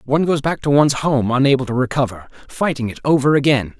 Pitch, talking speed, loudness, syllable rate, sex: 135 Hz, 205 wpm, -17 LUFS, 6.5 syllables/s, male